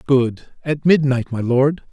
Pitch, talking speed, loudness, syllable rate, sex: 135 Hz, 155 wpm, -18 LUFS, 3.8 syllables/s, male